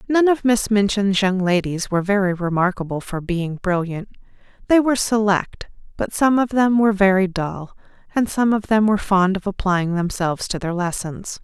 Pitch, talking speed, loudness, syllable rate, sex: 195 Hz, 180 wpm, -19 LUFS, 5.1 syllables/s, female